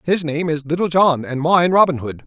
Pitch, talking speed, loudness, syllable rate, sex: 160 Hz, 240 wpm, -17 LUFS, 5.1 syllables/s, male